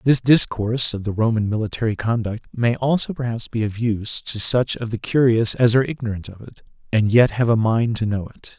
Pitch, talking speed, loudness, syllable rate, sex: 115 Hz, 215 wpm, -20 LUFS, 5.5 syllables/s, male